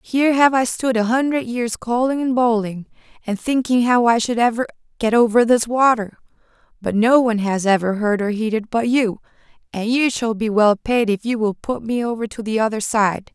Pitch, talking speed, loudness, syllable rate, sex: 230 Hz, 205 wpm, -18 LUFS, 5.2 syllables/s, female